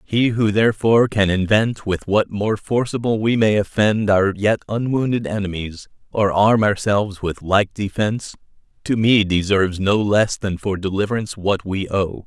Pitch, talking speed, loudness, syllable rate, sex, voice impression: 105 Hz, 165 wpm, -19 LUFS, 4.9 syllables/s, male, very masculine, very adult-like, middle-aged, very thick, slightly tensed, powerful, slightly bright, slightly soft, muffled, fluent, slightly raspy, very cool, very intellectual, slightly refreshing, sincere, calm, very mature, very friendly, very reassuring, very unique, very elegant, slightly wild, very sweet, slightly lively, very kind, slightly modest